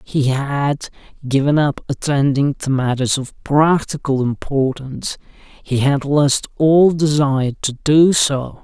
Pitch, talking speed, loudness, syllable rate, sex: 140 Hz, 125 wpm, -17 LUFS, 3.7 syllables/s, male